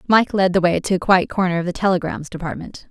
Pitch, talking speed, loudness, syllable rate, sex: 180 Hz, 250 wpm, -19 LUFS, 6.3 syllables/s, female